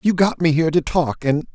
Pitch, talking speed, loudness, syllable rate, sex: 160 Hz, 275 wpm, -19 LUFS, 5.7 syllables/s, male